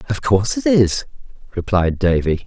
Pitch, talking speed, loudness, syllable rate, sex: 110 Hz, 145 wpm, -17 LUFS, 5.0 syllables/s, male